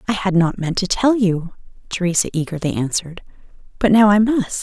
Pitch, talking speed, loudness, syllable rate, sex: 190 Hz, 180 wpm, -18 LUFS, 5.5 syllables/s, female